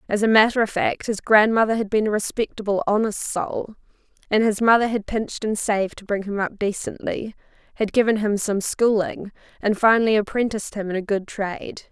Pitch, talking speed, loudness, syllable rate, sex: 210 Hz, 190 wpm, -21 LUFS, 5.6 syllables/s, female